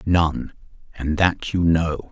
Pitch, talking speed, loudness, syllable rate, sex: 80 Hz, 140 wpm, -21 LUFS, 3.2 syllables/s, male